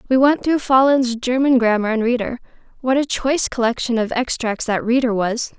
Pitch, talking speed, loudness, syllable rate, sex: 245 Hz, 170 wpm, -18 LUFS, 5.3 syllables/s, female